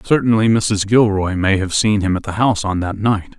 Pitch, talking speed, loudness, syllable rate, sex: 100 Hz, 230 wpm, -16 LUFS, 5.2 syllables/s, male